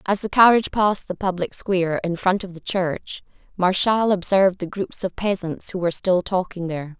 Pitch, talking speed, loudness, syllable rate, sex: 185 Hz, 195 wpm, -21 LUFS, 5.4 syllables/s, female